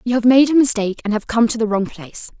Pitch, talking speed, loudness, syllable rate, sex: 225 Hz, 300 wpm, -16 LUFS, 6.8 syllables/s, female